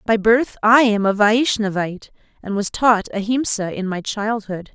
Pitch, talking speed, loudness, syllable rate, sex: 215 Hz, 165 wpm, -18 LUFS, 4.5 syllables/s, female